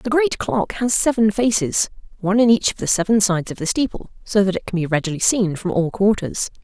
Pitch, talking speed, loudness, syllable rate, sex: 205 Hz, 215 wpm, -19 LUFS, 5.8 syllables/s, female